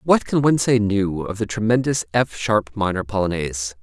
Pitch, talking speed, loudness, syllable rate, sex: 110 Hz, 190 wpm, -20 LUFS, 5.3 syllables/s, male